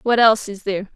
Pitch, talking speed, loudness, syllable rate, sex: 210 Hz, 250 wpm, -18 LUFS, 7.1 syllables/s, female